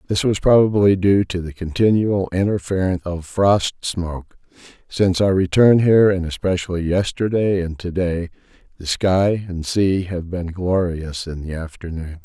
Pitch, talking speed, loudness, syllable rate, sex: 90 Hz, 150 wpm, -19 LUFS, 4.7 syllables/s, male